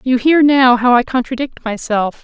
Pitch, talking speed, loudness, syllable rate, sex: 250 Hz, 190 wpm, -13 LUFS, 4.7 syllables/s, female